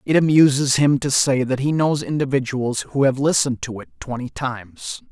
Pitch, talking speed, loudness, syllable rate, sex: 135 Hz, 190 wpm, -19 LUFS, 5.2 syllables/s, male